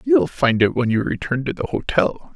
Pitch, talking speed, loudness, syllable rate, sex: 135 Hz, 255 wpm, -20 LUFS, 5.3 syllables/s, male